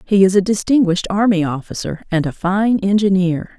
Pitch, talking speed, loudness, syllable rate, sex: 190 Hz, 170 wpm, -16 LUFS, 5.3 syllables/s, female